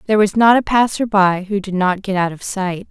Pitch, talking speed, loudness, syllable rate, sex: 200 Hz, 270 wpm, -16 LUFS, 5.5 syllables/s, female